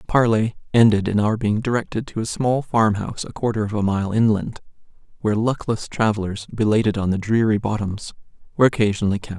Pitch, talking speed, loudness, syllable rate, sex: 110 Hz, 185 wpm, -20 LUFS, 6.0 syllables/s, male